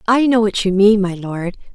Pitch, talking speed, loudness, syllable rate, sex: 205 Hz, 240 wpm, -15 LUFS, 4.9 syllables/s, female